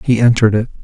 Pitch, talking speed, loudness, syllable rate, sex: 115 Hz, 215 wpm, -13 LUFS, 8.2 syllables/s, male